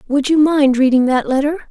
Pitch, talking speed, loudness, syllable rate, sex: 280 Hz, 210 wpm, -14 LUFS, 5.6 syllables/s, female